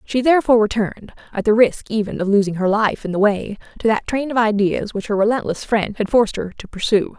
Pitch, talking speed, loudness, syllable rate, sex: 215 Hz, 235 wpm, -18 LUFS, 6.1 syllables/s, female